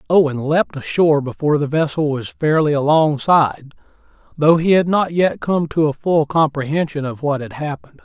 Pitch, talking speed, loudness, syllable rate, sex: 150 Hz, 170 wpm, -17 LUFS, 5.4 syllables/s, male